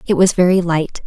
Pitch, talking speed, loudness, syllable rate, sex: 175 Hz, 225 wpm, -15 LUFS, 5.4 syllables/s, female